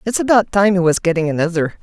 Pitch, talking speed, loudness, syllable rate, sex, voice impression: 185 Hz, 230 wpm, -15 LUFS, 6.5 syllables/s, female, very feminine, adult-like, slightly calm, elegant, slightly kind